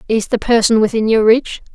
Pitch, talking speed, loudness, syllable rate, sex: 220 Hz, 205 wpm, -14 LUFS, 5.4 syllables/s, female